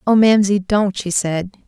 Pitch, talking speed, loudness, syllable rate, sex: 195 Hz, 180 wpm, -16 LUFS, 4.2 syllables/s, female